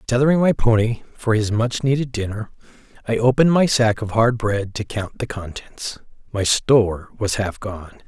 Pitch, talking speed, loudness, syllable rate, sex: 115 Hz, 180 wpm, -20 LUFS, 4.9 syllables/s, male